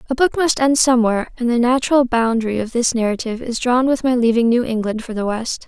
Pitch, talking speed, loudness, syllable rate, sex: 240 Hz, 235 wpm, -17 LUFS, 6.3 syllables/s, female